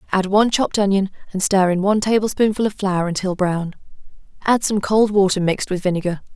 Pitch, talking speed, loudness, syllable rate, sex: 195 Hz, 190 wpm, -19 LUFS, 6.3 syllables/s, female